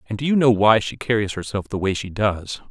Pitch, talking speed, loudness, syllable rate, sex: 105 Hz, 265 wpm, -20 LUFS, 5.5 syllables/s, male